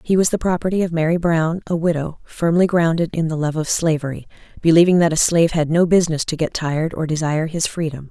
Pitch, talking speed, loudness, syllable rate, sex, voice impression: 165 Hz, 220 wpm, -18 LUFS, 6.2 syllables/s, female, very feminine, middle-aged, thin, tensed, slightly powerful, dark, hard, very clear, fluent, slightly raspy, cool, very intellectual, refreshing, very sincere, very calm, slightly friendly, very reassuring, slightly unique, very elegant, slightly wild, slightly sweet, kind, slightly intense, slightly modest